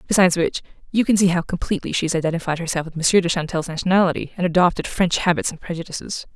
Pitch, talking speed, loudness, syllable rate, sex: 175 Hz, 210 wpm, -20 LUFS, 7.6 syllables/s, female